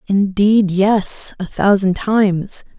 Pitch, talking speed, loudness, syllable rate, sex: 200 Hz, 110 wpm, -15 LUFS, 3.2 syllables/s, female